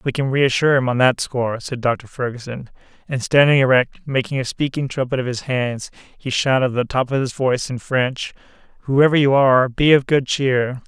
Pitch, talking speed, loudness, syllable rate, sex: 130 Hz, 200 wpm, -18 LUFS, 5.4 syllables/s, male